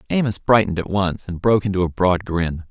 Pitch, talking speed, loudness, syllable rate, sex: 95 Hz, 220 wpm, -19 LUFS, 6.2 syllables/s, male